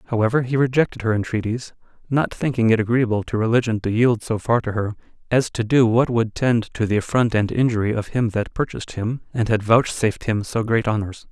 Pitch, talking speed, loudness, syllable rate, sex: 115 Hz, 210 wpm, -20 LUFS, 5.6 syllables/s, male